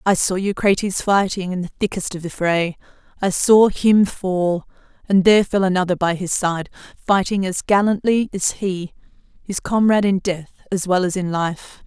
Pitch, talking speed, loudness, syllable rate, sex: 190 Hz, 170 wpm, -19 LUFS, 4.8 syllables/s, female